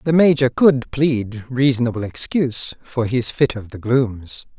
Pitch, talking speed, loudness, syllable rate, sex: 125 Hz, 155 wpm, -19 LUFS, 4.2 syllables/s, male